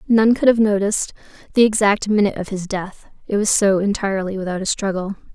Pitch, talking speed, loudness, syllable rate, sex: 200 Hz, 190 wpm, -18 LUFS, 6.1 syllables/s, female